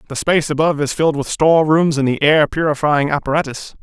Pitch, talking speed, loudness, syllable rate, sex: 150 Hz, 190 wpm, -16 LUFS, 6.5 syllables/s, male